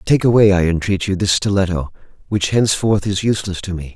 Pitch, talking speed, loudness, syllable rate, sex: 95 Hz, 195 wpm, -17 LUFS, 6.0 syllables/s, male